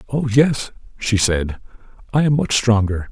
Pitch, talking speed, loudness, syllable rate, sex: 115 Hz, 155 wpm, -18 LUFS, 4.6 syllables/s, male